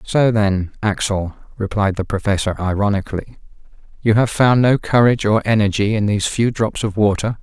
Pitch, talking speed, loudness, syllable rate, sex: 105 Hz, 160 wpm, -17 LUFS, 5.3 syllables/s, male